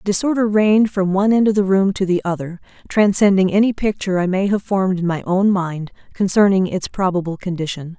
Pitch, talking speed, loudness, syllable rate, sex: 190 Hz, 195 wpm, -17 LUFS, 5.8 syllables/s, female